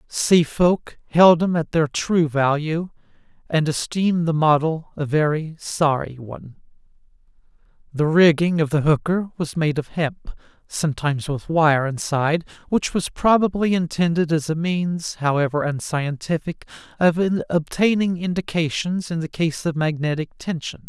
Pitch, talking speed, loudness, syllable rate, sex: 160 Hz, 135 wpm, -21 LUFS, 4.4 syllables/s, male